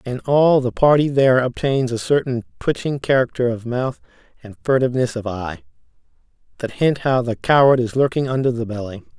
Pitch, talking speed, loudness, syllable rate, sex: 125 Hz, 170 wpm, -18 LUFS, 5.5 syllables/s, male